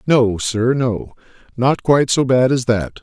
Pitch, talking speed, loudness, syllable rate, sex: 125 Hz, 180 wpm, -16 LUFS, 4.0 syllables/s, male